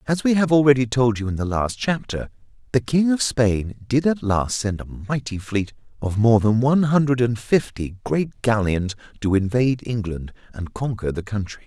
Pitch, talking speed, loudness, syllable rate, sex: 120 Hz, 190 wpm, -21 LUFS, 4.9 syllables/s, male